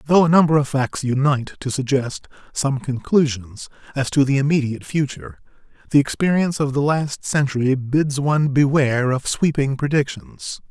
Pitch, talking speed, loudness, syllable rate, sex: 140 Hz, 150 wpm, -19 LUFS, 5.2 syllables/s, male